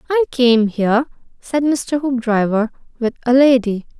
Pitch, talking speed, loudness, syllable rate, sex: 250 Hz, 135 wpm, -17 LUFS, 4.5 syllables/s, female